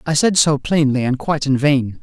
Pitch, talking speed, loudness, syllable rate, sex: 145 Hz, 205 wpm, -16 LUFS, 5.2 syllables/s, male